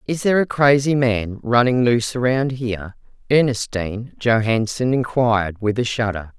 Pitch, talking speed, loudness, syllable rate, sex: 120 Hz, 140 wpm, -19 LUFS, 5.0 syllables/s, female